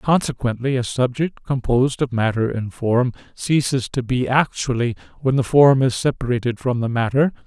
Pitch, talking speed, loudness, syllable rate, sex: 125 Hz, 160 wpm, -20 LUFS, 5.0 syllables/s, male